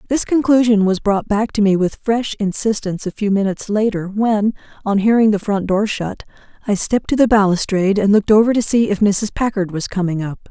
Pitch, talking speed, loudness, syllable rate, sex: 210 Hz, 210 wpm, -17 LUFS, 5.6 syllables/s, female